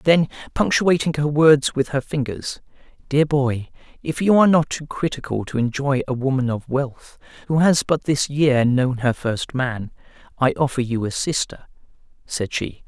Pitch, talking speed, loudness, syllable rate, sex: 140 Hz, 170 wpm, -20 LUFS, 4.5 syllables/s, male